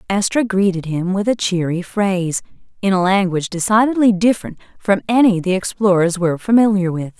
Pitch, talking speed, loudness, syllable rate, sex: 195 Hz, 160 wpm, -17 LUFS, 5.7 syllables/s, female